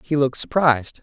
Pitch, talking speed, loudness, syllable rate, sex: 140 Hz, 175 wpm, -19 LUFS, 6.5 syllables/s, male